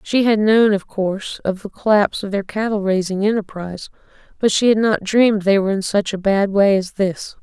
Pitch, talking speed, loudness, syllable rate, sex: 200 Hz, 220 wpm, -18 LUFS, 5.5 syllables/s, female